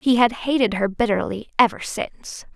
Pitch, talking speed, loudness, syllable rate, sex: 230 Hz, 165 wpm, -21 LUFS, 5.1 syllables/s, female